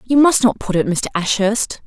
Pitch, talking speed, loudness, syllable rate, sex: 220 Hz, 225 wpm, -16 LUFS, 4.8 syllables/s, female